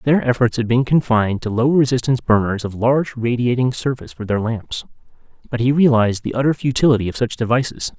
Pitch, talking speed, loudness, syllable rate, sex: 120 Hz, 190 wpm, -18 LUFS, 6.2 syllables/s, male